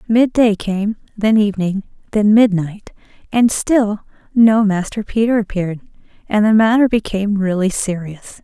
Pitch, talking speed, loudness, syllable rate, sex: 210 Hz, 135 wpm, -16 LUFS, 4.6 syllables/s, female